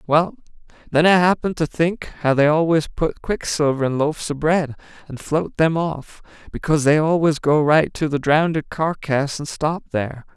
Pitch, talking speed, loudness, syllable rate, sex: 155 Hz, 180 wpm, -19 LUFS, 4.9 syllables/s, male